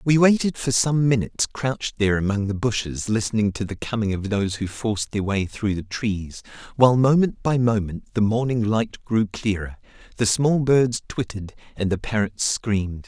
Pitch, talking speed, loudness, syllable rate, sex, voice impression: 110 Hz, 185 wpm, -22 LUFS, 5.1 syllables/s, male, masculine, adult-like, slightly clear, refreshing, sincere, friendly